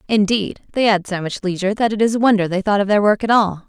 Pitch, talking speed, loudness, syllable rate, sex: 205 Hz, 295 wpm, -17 LUFS, 6.6 syllables/s, female